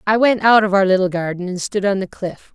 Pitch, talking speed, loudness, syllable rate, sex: 200 Hz, 285 wpm, -17 LUFS, 5.8 syllables/s, female